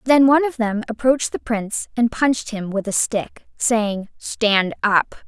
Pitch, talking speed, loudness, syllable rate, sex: 225 Hz, 180 wpm, -19 LUFS, 4.4 syllables/s, female